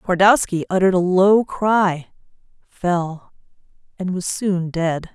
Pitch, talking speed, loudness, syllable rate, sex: 185 Hz, 115 wpm, -18 LUFS, 3.7 syllables/s, female